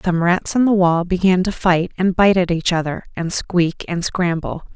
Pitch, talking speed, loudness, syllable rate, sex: 180 Hz, 200 wpm, -18 LUFS, 4.3 syllables/s, female